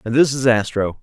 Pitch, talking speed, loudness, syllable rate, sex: 120 Hz, 235 wpm, -17 LUFS, 5.4 syllables/s, male